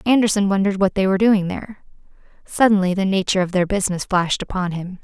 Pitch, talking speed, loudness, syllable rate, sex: 195 Hz, 190 wpm, -19 LUFS, 7.0 syllables/s, female